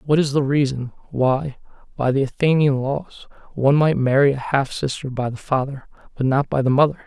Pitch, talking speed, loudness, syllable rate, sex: 135 Hz, 195 wpm, -20 LUFS, 5.2 syllables/s, male